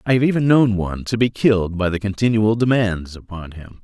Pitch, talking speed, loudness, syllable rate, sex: 105 Hz, 220 wpm, -18 LUFS, 5.7 syllables/s, male